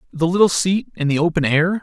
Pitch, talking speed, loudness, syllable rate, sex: 170 Hz, 230 wpm, -18 LUFS, 6.0 syllables/s, male